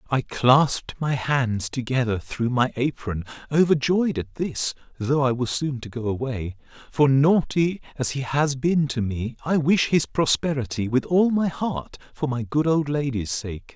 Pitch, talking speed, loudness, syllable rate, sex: 135 Hz, 175 wpm, -23 LUFS, 4.2 syllables/s, male